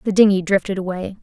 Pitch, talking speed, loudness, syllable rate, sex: 190 Hz, 195 wpm, -18 LUFS, 6.6 syllables/s, female